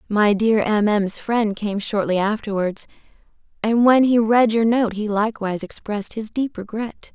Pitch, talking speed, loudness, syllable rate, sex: 215 Hz, 170 wpm, -20 LUFS, 4.7 syllables/s, female